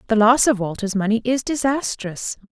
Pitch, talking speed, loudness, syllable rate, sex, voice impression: 225 Hz, 165 wpm, -20 LUFS, 5.1 syllables/s, female, very feminine, very adult-like, thin, slightly tensed, slightly weak, bright, soft, clear, very fluent, slightly raspy, cute, intellectual, very refreshing, sincere, calm, friendly, reassuring, unique, slightly elegant, very sweet, lively, kind, slightly modest, light